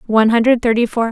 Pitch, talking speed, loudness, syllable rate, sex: 230 Hz, 215 wpm, -14 LUFS, 7.0 syllables/s, female